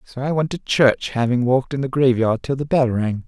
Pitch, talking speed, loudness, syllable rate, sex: 130 Hz, 255 wpm, -19 LUFS, 5.4 syllables/s, male